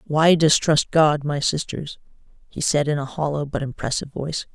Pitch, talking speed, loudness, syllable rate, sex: 150 Hz, 170 wpm, -21 LUFS, 5.1 syllables/s, female